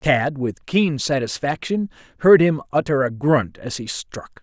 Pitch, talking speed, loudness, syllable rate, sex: 140 Hz, 165 wpm, -20 LUFS, 4.0 syllables/s, male